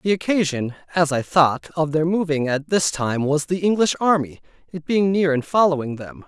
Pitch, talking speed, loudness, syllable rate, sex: 160 Hz, 200 wpm, -20 LUFS, 5.0 syllables/s, male